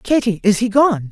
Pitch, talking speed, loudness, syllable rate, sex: 225 Hz, 215 wpm, -16 LUFS, 4.8 syllables/s, female